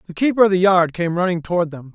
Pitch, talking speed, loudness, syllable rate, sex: 175 Hz, 275 wpm, -18 LUFS, 6.7 syllables/s, male